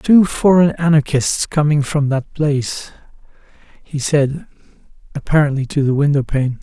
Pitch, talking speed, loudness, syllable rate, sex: 145 Hz, 125 wpm, -16 LUFS, 4.6 syllables/s, male